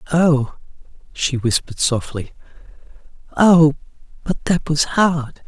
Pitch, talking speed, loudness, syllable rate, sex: 145 Hz, 100 wpm, -18 LUFS, 3.9 syllables/s, male